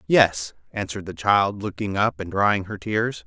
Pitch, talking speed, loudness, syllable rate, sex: 100 Hz, 185 wpm, -23 LUFS, 4.4 syllables/s, male